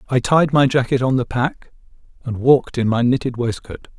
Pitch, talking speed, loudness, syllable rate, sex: 125 Hz, 195 wpm, -18 LUFS, 5.3 syllables/s, male